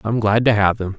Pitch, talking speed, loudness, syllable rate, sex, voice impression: 105 Hz, 305 wpm, -17 LUFS, 5.6 syllables/s, male, masculine, very adult-like, slightly thick, cool, sincere, slightly calm, slightly kind